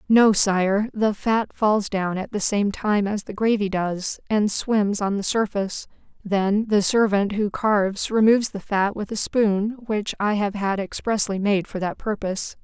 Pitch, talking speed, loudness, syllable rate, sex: 205 Hz, 185 wpm, -22 LUFS, 4.3 syllables/s, female